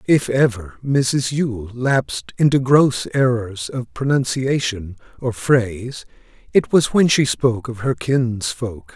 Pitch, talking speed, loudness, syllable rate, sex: 125 Hz, 135 wpm, -19 LUFS, 3.8 syllables/s, male